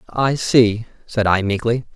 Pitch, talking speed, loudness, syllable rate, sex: 115 Hz, 155 wpm, -18 LUFS, 3.9 syllables/s, male